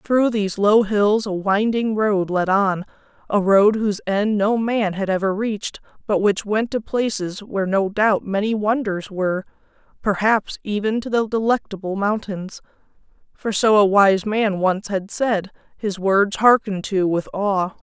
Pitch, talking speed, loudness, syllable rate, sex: 205 Hz, 160 wpm, -20 LUFS, 4.4 syllables/s, female